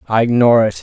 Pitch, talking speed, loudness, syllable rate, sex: 110 Hz, 220 wpm, -13 LUFS, 7.3 syllables/s, male